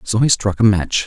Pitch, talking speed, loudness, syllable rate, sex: 105 Hz, 280 wpm, -15 LUFS, 5.2 syllables/s, male